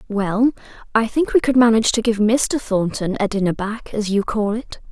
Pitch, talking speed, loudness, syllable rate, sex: 220 Hz, 210 wpm, -19 LUFS, 5.0 syllables/s, female